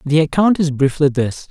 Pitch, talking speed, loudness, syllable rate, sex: 150 Hz, 200 wpm, -16 LUFS, 5.0 syllables/s, male